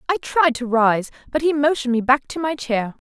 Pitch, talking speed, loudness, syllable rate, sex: 270 Hz, 235 wpm, -20 LUFS, 5.3 syllables/s, female